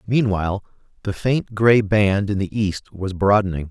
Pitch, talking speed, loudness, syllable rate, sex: 100 Hz, 160 wpm, -20 LUFS, 4.4 syllables/s, male